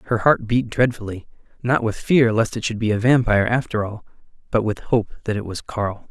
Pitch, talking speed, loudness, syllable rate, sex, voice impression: 110 Hz, 215 wpm, -20 LUFS, 5.4 syllables/s, male, very masculine, adult-like, slightly middle-aged, thick, tensed, slightly weak, slightly bright, hard, clear, fluent, slightly cool, intellectual, refreshing, very sincere, calm, mature, friendly, reassuring, slightly unique, slightly wild, slightly sweet, slightly lively, kind, modest